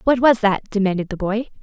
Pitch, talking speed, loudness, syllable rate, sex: 215 Hz, 220 wpm, -19 LUFS, 5.9 syllables/s, female